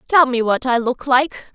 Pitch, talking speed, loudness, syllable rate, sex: 260 Hz, 235 wpm, -17 LUFS, 4.4 syllables/s, female